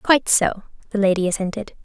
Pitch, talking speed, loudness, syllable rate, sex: 205 Hz, 165 wpm, -20 LUFS, 6.2 syllables/s, female